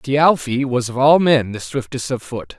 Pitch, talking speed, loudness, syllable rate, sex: 135 Hz, 210 wpm, -17 LUFS, 4.3 syllables/s, male